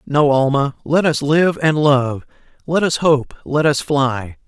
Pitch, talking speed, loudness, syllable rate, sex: 145 Hz, 150 wpm, -16 LUFS, 3.8 syllables/s, male